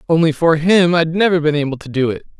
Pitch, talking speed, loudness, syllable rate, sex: 160 Hz, 250 wpm, -15 LUFS, 6.3 syllables/s, male